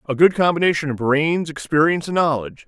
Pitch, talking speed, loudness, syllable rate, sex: 150 Hz, 180 wpm, -18 LUFS, 6.3 syllables/s, male